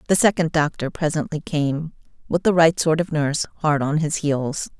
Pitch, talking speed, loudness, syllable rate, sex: 155 Hz, 190 wpm, -21 LUFS, 5.0 syllables/s, female